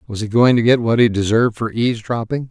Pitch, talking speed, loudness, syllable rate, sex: 115 Hz, 240 wpm, -16 LUFS, 6.4 syllables/s, male